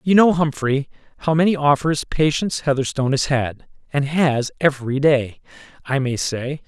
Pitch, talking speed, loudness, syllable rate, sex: 140 Hz, 155 wpm, -19 LUFS, 5.0 syllables/s, male